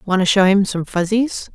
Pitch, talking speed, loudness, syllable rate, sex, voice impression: 195 Hz, 235 wpm, -17 LUFS, 4.9 syllables/s, female, feminine, adult-like, slightly muffled, calm, slightly reassuring